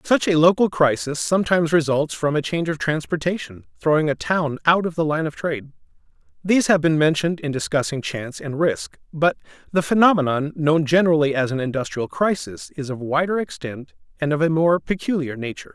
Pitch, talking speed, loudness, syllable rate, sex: 150 Hz, 185 wpm, -21 LUFS, 5.8 syllables/s, male